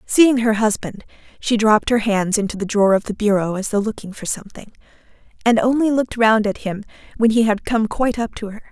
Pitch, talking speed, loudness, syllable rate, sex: 220 Hz, 220 wpm, -18 LUFS, 6.1 syllables/s, female